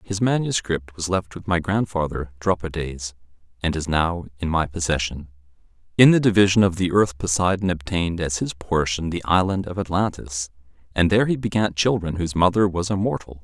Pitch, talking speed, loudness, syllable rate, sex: 90 Hz, 170 wpm, -22 LUFS, 5.5 syllables/s, male